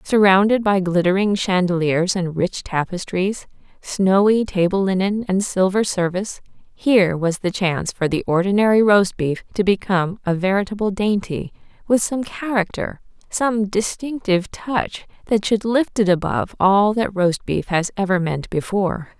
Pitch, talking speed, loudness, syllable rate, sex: 195 Hz, 145 wpm, -19 LUFS, 4.7 syllables/s, female